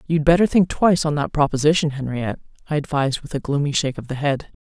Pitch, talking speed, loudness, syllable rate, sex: 150 Hz, 220 wpm, -20 LUFS, 6.9 syllables/s, female